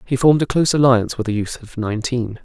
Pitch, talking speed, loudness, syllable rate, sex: 125 Hz, 245 wpm, -18 LUFS, 7.1 syllables/s, male